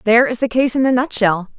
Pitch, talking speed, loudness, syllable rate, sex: 240 Hz, 265 wpm, -16 LUFS, 6.3 syllables/s, female